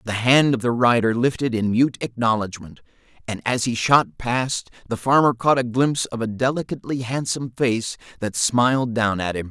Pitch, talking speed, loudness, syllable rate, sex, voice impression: 120 Hz, 185 wpm, -21 LUFS, 5.1 syllables/s, male, masculine, very adult-like, slightly thick, slightly sincere, slightly friendly, slightly unique